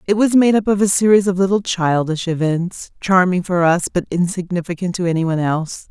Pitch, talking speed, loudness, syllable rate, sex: 180 Hz, 205 wpm, -17 LUFS, 5.8 syllables/s, female